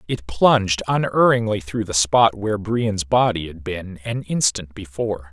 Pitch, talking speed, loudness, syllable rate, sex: 100 Hz, 160 wpm, -20 LUFS, 4.6 syllables/s, male